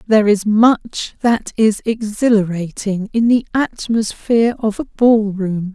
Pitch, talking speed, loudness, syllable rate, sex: 215 Hz, 135 wpm, -16 LUFS, 3.9 syllables/s, female